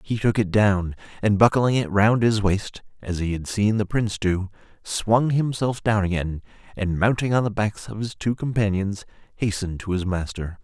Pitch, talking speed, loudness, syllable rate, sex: 105 Hz, 190 wpm, -23 LUFS, 4.8 syllables/s, male